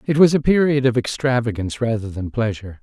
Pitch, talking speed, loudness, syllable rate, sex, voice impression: 120 Hz, 190 wpm, -19 LUFS, 6.3 syllables/s, male, very masculine, very adult-like, very middle-aged, thick, slightly relaxed, slightly weak, soft, muffled, slightly fluent, cool, intellectual, slightly refreshing, very sincere, very calm, slightly mature, very friendly, very reassuring, slightly unique, elegant, slightly wild, slightly sweet, kind, very modest